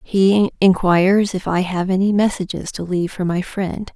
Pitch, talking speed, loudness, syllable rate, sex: 190 Hz, 180 wpm, -18 LUFS, 4.8 syllables/s, female